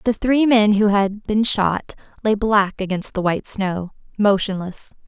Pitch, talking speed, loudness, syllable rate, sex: 205 Hz, 165 wpm, -19 LUFS, 4.2 syllables/s, female